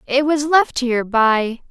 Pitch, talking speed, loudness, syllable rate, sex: 255 Hz, 175 wpm, -17 LUFS, 4.0 syllables/s, female